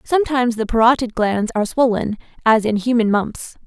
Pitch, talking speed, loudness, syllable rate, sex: 230 Hz, 165 wpm, -18 LUFS, 5.7 syllables/s, female